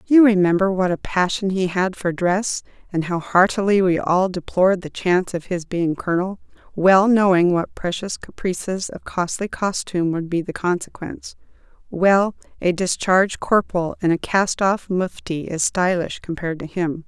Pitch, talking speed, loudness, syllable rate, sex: 185 Hz, 165 wpm, -20 LUFS, 4.9 syllables/s, female